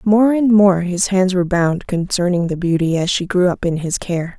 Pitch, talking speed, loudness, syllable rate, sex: 185 Hz, 235 wpm, -16 LUFS, 4.9 syllables/s, female